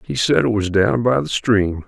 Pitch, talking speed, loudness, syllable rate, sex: 110 Hz, 255 wpm, -17 LUFS, 4.6 syllables/s, male